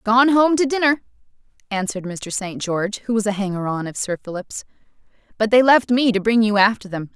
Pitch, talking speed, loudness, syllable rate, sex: 215 Hz, 210 wpm, -19 LUFS, 5.7 syllables/s, female